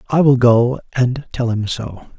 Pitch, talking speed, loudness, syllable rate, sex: 125 Hz, 190 wpm, -16 LUFS, 3.9 syllables/s, male